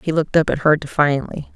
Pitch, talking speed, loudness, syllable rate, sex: 150 Hz, 230 wpm, -18 LUFS, 6.4 syllables/s, female